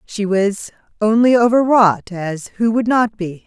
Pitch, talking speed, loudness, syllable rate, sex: 210 Hz, 175 wpm, -16 LUFS, 4.1 syllables/s, female